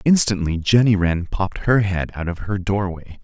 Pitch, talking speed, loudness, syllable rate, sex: 95 Hz, 185 wpm, -20 LUFS, 4.9 syllables/s, male